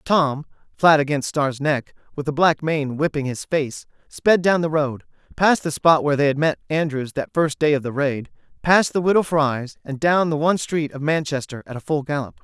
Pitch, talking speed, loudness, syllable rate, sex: 150 Hz, 210 wpm, -20 LUFS, 5.1 syllables/s, male